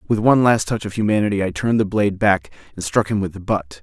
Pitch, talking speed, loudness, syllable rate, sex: 100 Hz, 265 wpm, -19 LUFS, 6.5 syllables/s, male